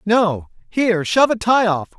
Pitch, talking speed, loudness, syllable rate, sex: 205 Hz, 150 wpm, -17 LUFS, 4.9 syllables/s, male